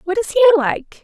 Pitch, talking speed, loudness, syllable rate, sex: 385 Hz, 230 wpm, -15 LUFS, 5.6 syllables/s, female